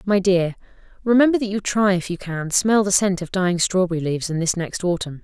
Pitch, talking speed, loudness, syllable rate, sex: 185 Hz, 230 wpm, -20 LUFS, 5.8 syllables/s, female